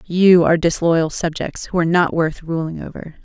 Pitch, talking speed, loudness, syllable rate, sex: 170 Hz, 185 wpm, -17 LUFS, 5.1 syllables/s, female